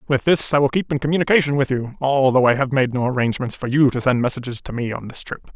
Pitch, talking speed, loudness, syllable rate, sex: 135 Hz, 270 wpm, -19 LUFS, 6.7 syllables/s, male